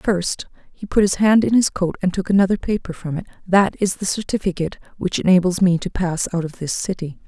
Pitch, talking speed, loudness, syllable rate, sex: 185 Hz, 225 wpm, -20 LUFS, 5.7 syllables/s, female